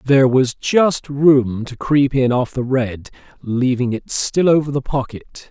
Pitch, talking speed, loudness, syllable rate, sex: 130 Hz, 175 wpm, -17 LUFS, 3.9 syllables/s, male